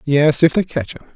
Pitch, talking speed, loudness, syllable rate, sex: 150 Hz, 210 wpm, -16 LUFS, 5.3 syllables/s, male